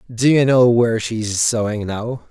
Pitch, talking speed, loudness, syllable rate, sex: 115 Hz, 180 wpm, -17 LUFS, 4.2 syllables/s, male